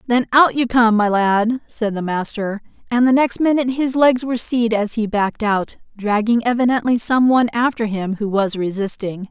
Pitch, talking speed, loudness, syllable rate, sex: 230 Hz, 195 wpm, -17 LUFS, 5.0 syllables/s, female